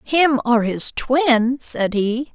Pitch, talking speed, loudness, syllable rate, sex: 250 Hz, 155 wpm, -18 LUFS, 2.8 syllables/s, female